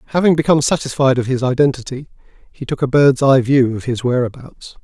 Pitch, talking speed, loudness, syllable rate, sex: 130 Hz, 185 wpm, -15 LUFS, 6.0 syllables/s, male